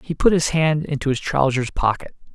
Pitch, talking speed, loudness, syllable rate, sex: 145 Hz, 205 wpm, -20 LUFS, 5.3 syllables/s, male